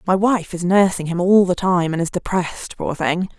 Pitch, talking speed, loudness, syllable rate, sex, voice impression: 180 Hz, 230 wpm, -18 LUFS, 5.0 syllables/s, female, feminine, adult-like, slightly muffled, fluent, slightly intellectual, slightly intense